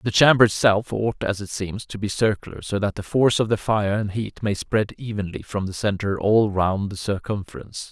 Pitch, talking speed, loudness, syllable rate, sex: 105 Hz, 220 wpm, -22 LUFS, 5.3 syllables/s, male